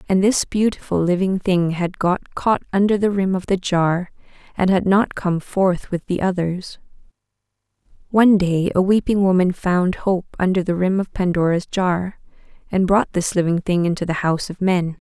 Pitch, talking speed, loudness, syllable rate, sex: 185 Hz, 180 wpm, -19 LUFS, 4.8 syllables/s, female